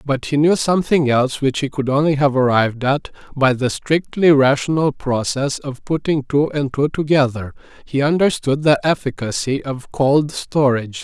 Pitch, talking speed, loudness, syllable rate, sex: 140 Hz, 160 wpm, -17 LUFS, 4.8 syllables/s, male